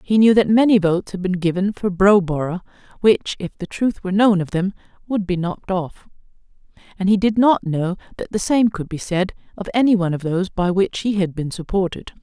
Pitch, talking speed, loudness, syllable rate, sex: 190 Hz, 215 wpm, -19 LUFS, 5.7 syllables/s, female